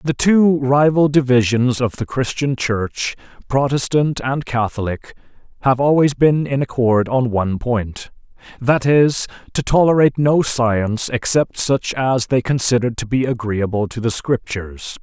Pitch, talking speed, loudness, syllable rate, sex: 125 Hz, 145 wpm, -17 LUFS, 4.4 syllables/s, male